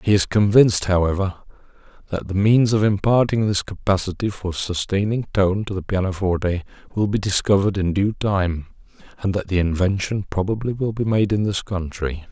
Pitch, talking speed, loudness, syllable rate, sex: 100 Hz, 165 wpm, -20 LUFS, 5.3 syllables/s, male